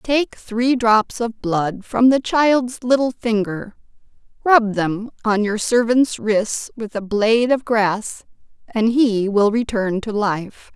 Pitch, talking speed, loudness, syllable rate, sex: 225 Hz, 150 wpm, -18 LUFS, 3.4 syllables/s, female